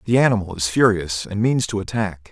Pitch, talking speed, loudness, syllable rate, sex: 105 Hz, 210 wpm, -20 LUFS, 5.6 syllables/s, male